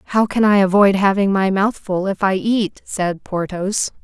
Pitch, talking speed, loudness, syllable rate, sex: 195 Hz, 195 wpm, -17 LUFS, 4.4 syllables/s, female